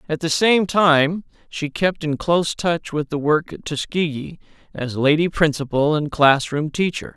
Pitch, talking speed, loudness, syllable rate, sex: 160 Hz, 170 wpm, -19 LUFS, 4.4 syllables/s, male